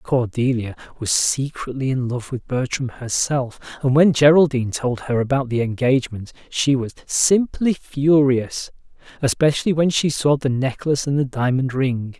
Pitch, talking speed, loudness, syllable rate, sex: 135 Hz, 150 wpm, -20 LUFS, 4.7 syllables/s, male